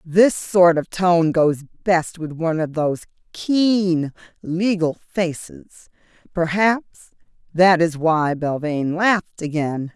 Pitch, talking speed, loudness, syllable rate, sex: 170 Hz, 120 wpm, -19 LUFS, 3.7 syllables/s, female